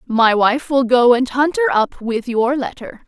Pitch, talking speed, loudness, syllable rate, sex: 255 Hz, 215 wpm, -16 LUFS, 4.3 syllables/s, female